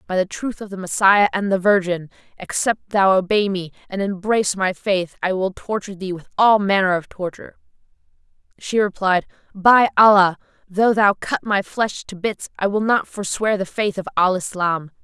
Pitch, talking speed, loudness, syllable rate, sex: 195 Hz, 185 wpm, -19 LUFS, 5.0 syllables/s, female